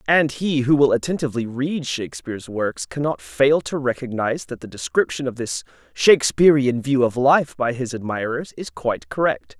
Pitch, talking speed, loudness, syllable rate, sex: 130 Hz, 175 wpm, -21 LUFS, 5.2 syllables/s, male